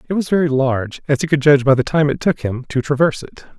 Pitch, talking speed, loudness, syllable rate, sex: 140 Hz, 285 wpm, -17 LUFS, 7.3 syllables/s, male